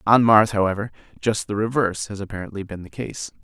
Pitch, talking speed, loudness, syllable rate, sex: 100 Hz, 190 wpm, -22 LUFS, 6.1 syllables/s, male